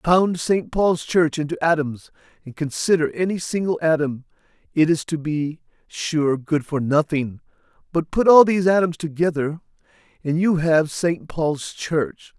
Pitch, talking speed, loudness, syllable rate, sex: 160 Hz, 150 wpm, -21 LUFS, 4.2 syllables/s, male